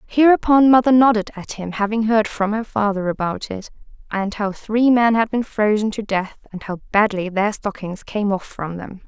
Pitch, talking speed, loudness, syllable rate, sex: 210 Hz, 200 wpm, -19 LUFS, 4.8 syllables/s, female